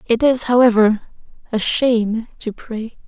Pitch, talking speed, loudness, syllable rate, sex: 230 Hz, 135 wpm, -17 LUFS, 4.2 syllables/s, female